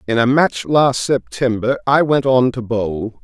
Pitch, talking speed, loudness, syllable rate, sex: 125 Hz, 185 wpm, -16 LUFS, 4.1 syllables/s, male